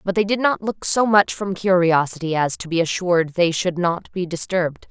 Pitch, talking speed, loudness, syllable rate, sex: 180 Hz, 220 wpm, -20 LUFS, 5.2 syllables/s, female